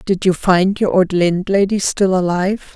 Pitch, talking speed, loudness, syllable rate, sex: 185 Hz, 175 wpm, -16 LUFS, 4.7 syllables/s, female